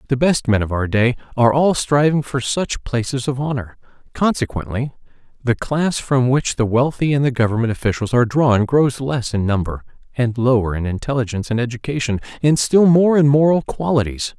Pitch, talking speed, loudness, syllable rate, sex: 130 Hz, 180 wpm, -18 LUFS, 5.4 syllables/s, male